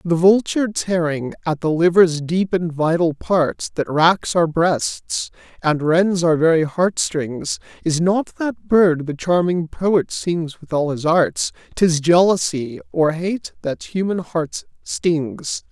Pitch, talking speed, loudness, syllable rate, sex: 170 Hz, 150 wpm, -19 LUFS, 3.5 syllables/s, male